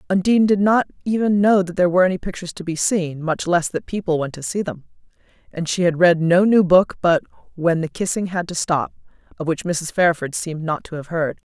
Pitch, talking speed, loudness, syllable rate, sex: 175 Hz, 230 wpm, -19 LUFS, 5.9 syllables/s, female